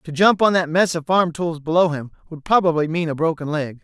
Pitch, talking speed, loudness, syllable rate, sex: 165 Hz, 250 wpm, -19 LUFS, 5.6 syllables/s, male